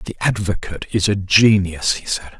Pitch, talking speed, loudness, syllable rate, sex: 95 Hz, 175 wpm, -18 LUFS, 5.3 syllables/s, male